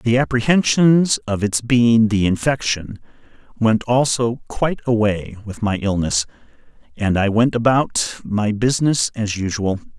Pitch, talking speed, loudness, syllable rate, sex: 115 Hz, 130 wpm, -18 LUFS, 4.2 syllables/s, male